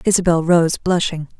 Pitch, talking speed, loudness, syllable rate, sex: 170 Hz, 130 wpm, -17 LUFS, 4.9 syllables/s, female